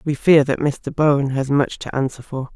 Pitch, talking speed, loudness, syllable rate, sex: 140 Hz, 235 wpm, -19 LUFS, 4.6 syllables/s, female